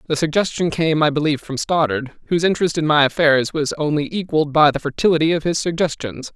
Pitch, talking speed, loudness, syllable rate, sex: 155 Hz, 200 wpm, -18 LUFS, 6.4 syllables/s, male